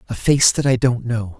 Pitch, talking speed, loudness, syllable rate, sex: 120 Hz, 260 wpm, -17 LUFS, 5.0 syllables/s, male